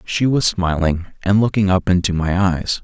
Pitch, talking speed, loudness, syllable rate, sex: 95 Hz, 190 wpm, -17 LUFS, 4.7 syllables/s, male